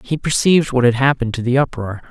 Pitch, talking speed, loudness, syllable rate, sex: 130 Hz, 230 wpm, -16 LUFS, 6.7 syllables/s, male